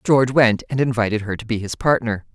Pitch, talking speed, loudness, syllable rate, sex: 115 Hz, 230 wpm, -19 LUFS, 5.9 syllables/s, female